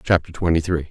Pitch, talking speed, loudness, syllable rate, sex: 80 Hz, 200 wpm, -20 LUFS, 6.6 syllables/s, male